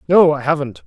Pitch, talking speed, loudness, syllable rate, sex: 145 Hz, 210 wpm, -16 LUFS, 6.0 syllables/s, male